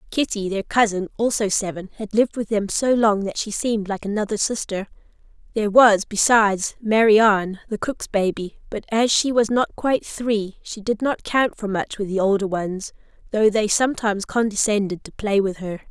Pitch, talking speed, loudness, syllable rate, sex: 210 Hz, 185 wpm, -21 LUFS, 5.2 syllables/s, female